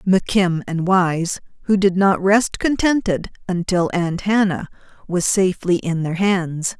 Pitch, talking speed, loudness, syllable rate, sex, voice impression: 185 Hz, 140 wpm, -19 LUFS, 4.2 syllables/s, female, feminine, slightly gender-neutral, very middle-aged, slightly thin, tensed, powerful, slightly dark, hard, clear, fluent, slightly raspy, cool, very intellectual, refreshing, sincere, calm, very friendly, reassuring, very unique, elegant, wild, slightly sweet, lively, slightly kind, slightly intense